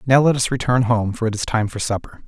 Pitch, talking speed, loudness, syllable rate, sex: 120 Hz, 290 wpm, -19 LUFS, 6.1 syllables/s, male